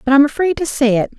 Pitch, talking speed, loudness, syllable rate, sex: 275 Hz, 305 wpm, -15 LUFS, 6.8 syllables/s, female